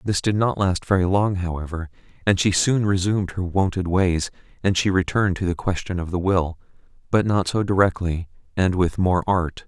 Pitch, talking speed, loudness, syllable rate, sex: 90 Hz, 190 wpm, -22 LUFS, 5.2 syllables/s, male